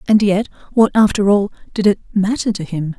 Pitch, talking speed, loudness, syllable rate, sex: 200 Hz, 200 wpm, -16 LUFS, 5.5 syllables/s, female